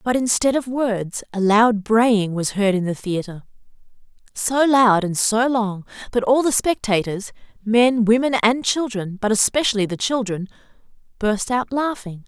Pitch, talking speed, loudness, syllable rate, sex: 225 Hz, 145 wpm, -19 LUFS, 4.4 syllables/s, female